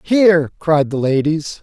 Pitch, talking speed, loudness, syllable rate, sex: 160 Hz, 145 wpm, -15 LUFS, 3.5 syllables/s, male